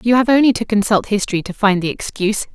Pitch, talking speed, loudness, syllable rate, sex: 210 Hz, 235 wpm, -16 LUFS, 6.8 syllables/s, female